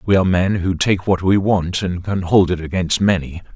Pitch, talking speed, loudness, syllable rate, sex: 90 Hz, 235 wpm, -17 LUFS, 5.1 syllables/s, male